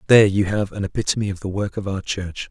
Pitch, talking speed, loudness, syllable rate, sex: 100 Hz, 265 wpm, -21 LUFS, 6.5 syllables/s, male